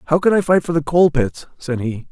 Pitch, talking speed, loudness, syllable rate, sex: 155 Hz, 285 wpm, -17 LUFS, 5.6 syllables/s, male